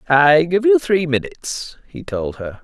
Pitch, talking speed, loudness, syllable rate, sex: 160 Hz, 180 wpm, -17 LUFS, 4.2 syllables/s, male